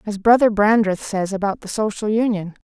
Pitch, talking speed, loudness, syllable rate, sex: 210 Hz, 180 wpm, -19 LUFS, 5.2 syllables/s, female